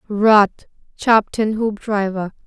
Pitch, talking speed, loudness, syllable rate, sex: 210 Hz, 95 wpm, -17 LUFS, 3.7 syllables/s, female